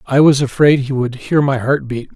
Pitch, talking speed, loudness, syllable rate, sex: 135 Hz, 250 wpm, -15 LUFS, 5.0 syllables/s, male